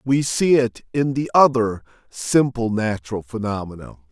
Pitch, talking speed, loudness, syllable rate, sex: 125 Hz, 130 wpm, -20 LUFS, 4.6 syllables/s, male